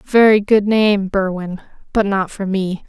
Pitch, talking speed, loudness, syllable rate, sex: 200 Hz, 190 wpm, -16 LUFS, 4.5 syllables/s, female